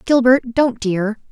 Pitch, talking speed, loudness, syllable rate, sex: 235 Hz, 135 wpm, -16 LUFS, 3.7 syllables/s, female